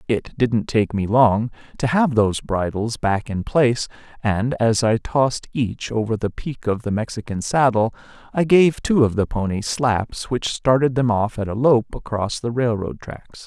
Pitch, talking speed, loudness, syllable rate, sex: 115 Hz, 185 wpm, -20 LUFS, 4.4 syllables/s, male